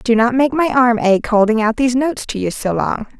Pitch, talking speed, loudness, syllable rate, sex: 240 Hz, 265 wpm, -15 LUFS, 5.6 syllables/s, female